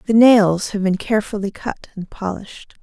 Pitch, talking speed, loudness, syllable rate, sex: 205 Hz, 170 wpm, -18 LUFS, 5.8 syllables/s, female